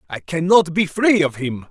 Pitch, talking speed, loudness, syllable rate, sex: 170 Hz, 245 wpm, -17 LUFS, 4.6 syllables/s, male